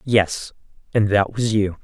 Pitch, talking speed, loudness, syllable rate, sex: 105 Hz, 165 wpm, -20 LUFS, 3.8 syllables/s, male